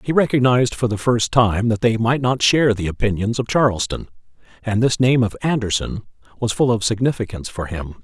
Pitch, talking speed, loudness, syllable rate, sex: 115 Hz, 195 wpm, -19 LUFS, 5.8 syllables/s, male